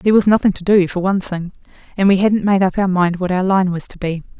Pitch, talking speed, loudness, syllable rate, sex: 190 Hz, 285 wpm, -16 LUFS, 6.4 syllables/s, female